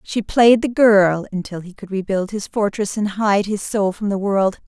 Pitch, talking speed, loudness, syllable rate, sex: 205 Hz, 220 wpm, -18 LUFS, 4.5 syllables/s, female